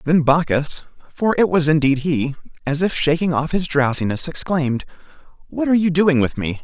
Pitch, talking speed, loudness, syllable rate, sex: 155 Hz, 180 wpm, -19 LUFS, 4.7 syllables/s, male